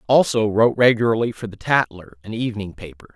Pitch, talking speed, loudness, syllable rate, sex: 110 Hz, 170 wpm, -19 LUFS, 6.3 syllables/s, male